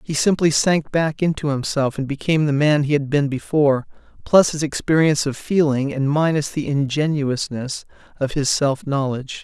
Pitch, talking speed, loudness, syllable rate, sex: 145 Hz, 170 wpm, -19 LUFS, 5.1 syllables/s, male